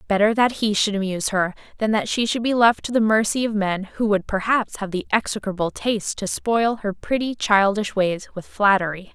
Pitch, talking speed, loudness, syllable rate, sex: 210 Hz, 210 wpm, -21 LUFS, 5.2 syllables/s, female